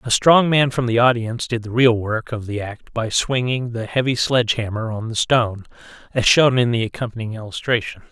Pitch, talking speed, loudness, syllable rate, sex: 120 Hz, 205 wpm, -19 LUFS, 5.6 syllables/s, male